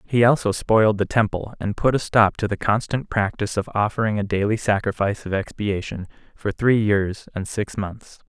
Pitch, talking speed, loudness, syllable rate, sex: 105 Hz, 190 wpm, -22 LUFS, 5.2 syllables/s, male